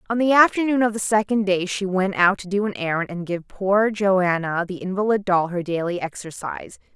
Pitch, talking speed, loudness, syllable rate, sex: 195 Hz, 205 wpm, -21 LUFS, 5.3 syllables/s, female